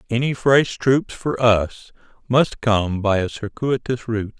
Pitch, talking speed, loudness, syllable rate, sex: 120 Hz, 150 wpm, -20 LUFS, 3.9 syllables/s, male